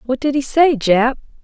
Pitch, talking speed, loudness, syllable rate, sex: 265 Hz, 210 wpm, -16 LUFS, 4.7 syllables/s, female